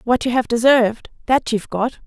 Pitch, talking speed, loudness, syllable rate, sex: 240 Hz, 205 wpm, -18 LUFS, 5.6 syllables/s, female